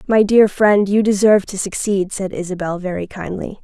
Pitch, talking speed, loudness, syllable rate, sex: 195 Hz, 180 wpm, -17 LUFS, 5.2 syllables/s, female